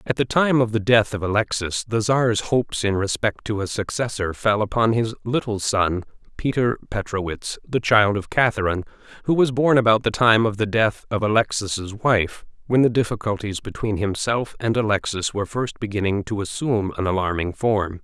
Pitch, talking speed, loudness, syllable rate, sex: 110 Hz, 180 wpm, -21 LUFS, 5.2 syllables/s, male